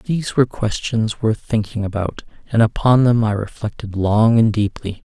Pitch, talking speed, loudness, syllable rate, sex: 110 Hz, 165 wpm, -18 LUFS, 4.8 syllables/s, male